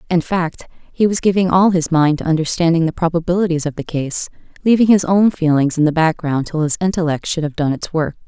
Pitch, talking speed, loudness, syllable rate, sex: 165 Hz, 220 wpm, -16 LUFS, 5.8 syllables/s, female